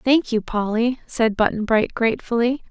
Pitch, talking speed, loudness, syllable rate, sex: 230 Hz, 155 wpm, -20 LUFS, 4.9 syllables/s, female